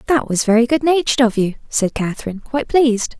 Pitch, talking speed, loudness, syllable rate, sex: 240 Hz, 190 wpm, -17 LUFS, 6.6 syllables/s, female